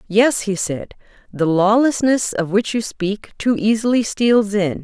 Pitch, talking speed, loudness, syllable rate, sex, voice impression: 210 Hz, 160 wpm, -18 LUFS, 4.0 syllables/s, female, very feminine, middle-aged, slightly thin, tensed, slightly powerful, bright, slightly soft, clear, fluent, slightly raspy, cool, very intellectual, refreshing, sincere, calm, very friendly, very reassuring, unique, elegant, slightly wild, sweet, lively, very kind, light